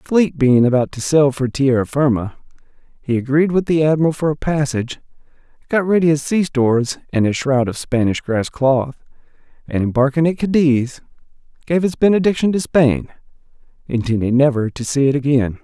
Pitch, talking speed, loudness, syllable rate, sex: 140 Hz, 165 wpm, -17 LUFS, 5.4 syllables/s, male